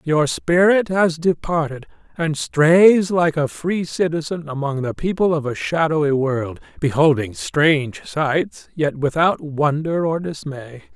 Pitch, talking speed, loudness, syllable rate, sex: 155 Hz, 135 wpm, -19 LUFS, 3.9 syllables/s, male